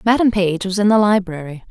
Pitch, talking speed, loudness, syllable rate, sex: 195 Hz, 210 wpm, -16 LUFS, 5.9 syllables/s, female